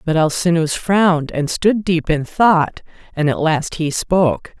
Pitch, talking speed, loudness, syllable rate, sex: 165 Hz, 170 wpm, -17 LUFS, 4.1 syllables/s, female